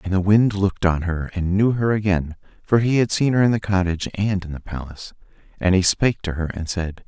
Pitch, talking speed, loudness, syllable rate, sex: 95 Hz, 245 wpm, -20 LUFS, 5.9 syllables/s, male